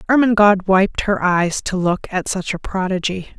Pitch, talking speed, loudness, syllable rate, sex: 195 Hz, 175 wpm, -17 LUFS, 4.8 syllables/s, female